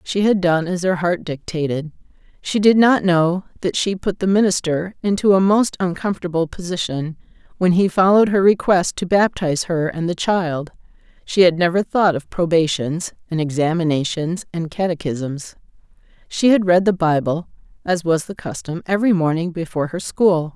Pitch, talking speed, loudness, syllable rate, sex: 175 Hz, 165 wpm, -18 LUFS, 5.0 syllables/s, female